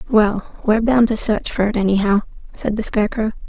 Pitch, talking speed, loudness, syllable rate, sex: 215 Hz, 190 wpm, -18 LUFS, 5.6 syllables/s, female